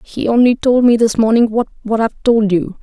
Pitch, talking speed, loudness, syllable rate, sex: 225 Hz, 210 wpm, -14 LUFS, 5.5 syllables/s, female